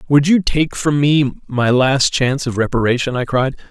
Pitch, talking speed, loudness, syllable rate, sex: 135 Hz, 195 wpm, -16 LUFS, 4.9 syllables/s, male